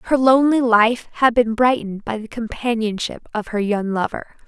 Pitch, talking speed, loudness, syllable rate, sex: 230 Hz, 175 wpm, -19 LUFS, 5.0 syllables/s, female